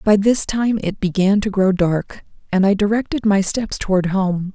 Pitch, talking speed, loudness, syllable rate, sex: 200 Hz, 200 wpm, -18 LUFS, 4.6 syllables/s, female